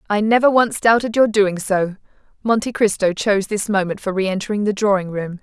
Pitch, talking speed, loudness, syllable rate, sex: 205 Hz, 200 wpm, -18 LUFS, 5.7 syllables/s, female